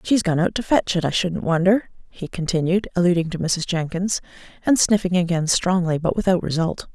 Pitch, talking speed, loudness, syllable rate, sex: 180 Hz, 190 wpm, -21 LUFS, 5.4 syllables/s, female